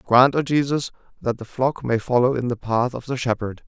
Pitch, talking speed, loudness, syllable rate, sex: 125 Hz, 230 wpm, -22 LUFS, 5.3 syllables/s, male